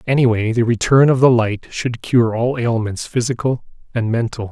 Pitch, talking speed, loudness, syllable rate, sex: 120 Hz, 175 wpm, -17 LUFS, 4.9 syllables/s, male